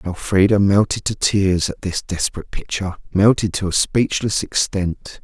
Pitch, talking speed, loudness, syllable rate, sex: 95 Hz, 150 wpm, -18 LUFS, 4.8 syllables/s, male